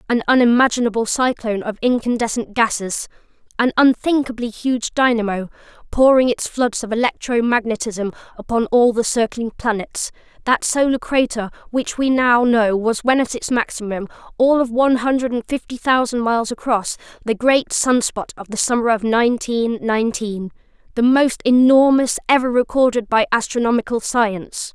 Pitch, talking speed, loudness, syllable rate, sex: 235 Hz, 145 wpm, -18 LUFS, 5.1 syllables/s, female